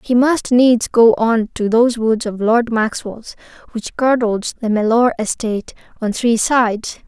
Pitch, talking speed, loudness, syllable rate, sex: 230 Hz, 160 wpm, -16 LUFS, 4.4 syllables/s, female